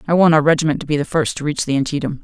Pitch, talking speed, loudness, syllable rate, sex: 150 Hz, 320 wpm, -17 LUFS, 7.7 syllables/s, female